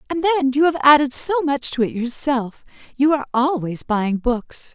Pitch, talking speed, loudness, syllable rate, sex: 270 Hz, 190 wpm, -19 LUFS, 4.8 syllables/s, female